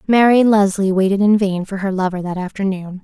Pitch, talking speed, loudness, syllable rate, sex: 195 Hz, 195 wpm, -16 LUFS, 5.6 syllables/s, female